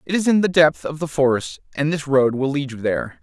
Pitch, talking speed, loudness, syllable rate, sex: 145 Hz, 280 wpm, -19 LUFS, 5.7 syllables/s, male